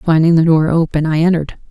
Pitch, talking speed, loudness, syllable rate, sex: 160 Hz, 210 wpm, -13 LUFS, 6.4 syllables/s, female